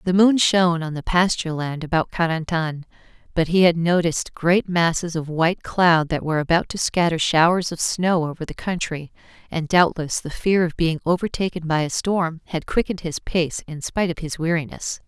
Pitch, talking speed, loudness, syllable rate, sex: 170 Hz, 190 wpm, -21 LUFS, 5.3 syllables/s, female